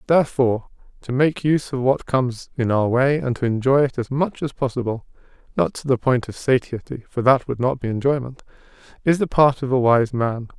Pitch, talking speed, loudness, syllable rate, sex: 130 Hz, 210 wpm, -20 LUFS, 4.1 syllables/s, male